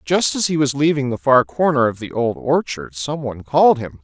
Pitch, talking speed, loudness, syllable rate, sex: 130 Hz, 240 wpm, -18 LUFS, 5.3 syllables/s, male